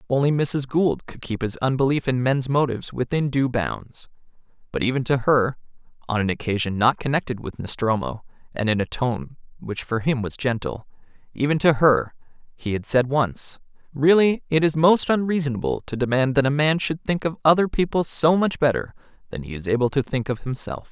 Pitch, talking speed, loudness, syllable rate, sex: 135 Hz, 190 wpm, -22 LUFS, 4.4 syllables/s, male